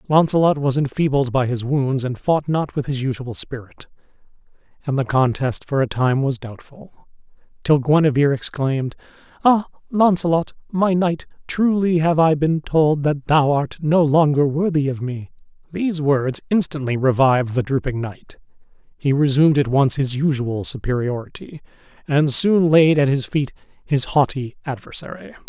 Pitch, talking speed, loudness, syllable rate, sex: 145 Hz, 150 wpm, -19 LUFS, 4.8 syllables/s, male